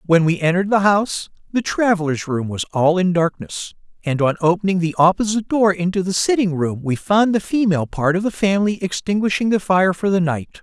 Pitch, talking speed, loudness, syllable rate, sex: 180 Hz, 205 wpm, -18 LUFS, 5.7 syllables/s, male